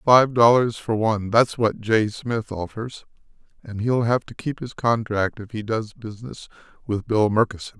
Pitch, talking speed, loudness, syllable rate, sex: 110 Hz, 170 wpm, -22 LUFS, 4.6 syllables/s, male